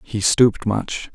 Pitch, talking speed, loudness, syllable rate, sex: 110 Hz, 155 wpm, -19 LUFS, 3.8 syllables/s, male